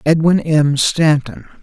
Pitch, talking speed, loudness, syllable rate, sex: 150 Hz, 110 wpm, -14 LUFS, 3.6 syllables/s, male